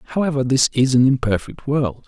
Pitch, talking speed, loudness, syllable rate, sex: 130 Hz, 175 wpm, -18 LUFS, 5.8 syllables/s, male